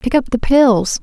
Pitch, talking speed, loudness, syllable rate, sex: 250 Hz, 235 wpm, -14 LUFS, 4.0 syllables/s, female